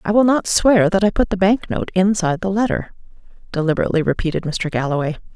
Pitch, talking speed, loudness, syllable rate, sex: 185 Hz, 190 wpm, -18 LUFS, 6.4 syllables/s, female